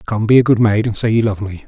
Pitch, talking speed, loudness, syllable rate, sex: 110 Hz, 360 wpm, -14 LUFS, 6.6 syllables/s, male